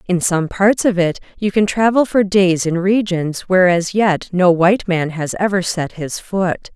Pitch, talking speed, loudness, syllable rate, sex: 185 Hz, 205 wpm, -16 LUFS, 4.4 syllables/s, female